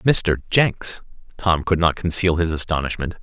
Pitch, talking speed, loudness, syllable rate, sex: 85 Hz, 150 wpm, -20 LUFS, 4.5 syllables/s, male